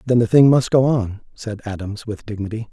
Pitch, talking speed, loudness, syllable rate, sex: 110 Hz, 220 wpm, -18 LUFS, 5.4 syllables/s, male